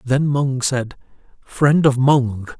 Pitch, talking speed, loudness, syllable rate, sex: 135 Hz, 140 wpm, -17 LUFS, 3.0 syllables/s, male